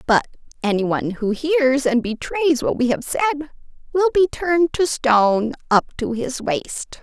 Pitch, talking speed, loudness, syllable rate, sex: 270 Hz, 160 wpm, -20 LUFS, 4.6 syllables/s, female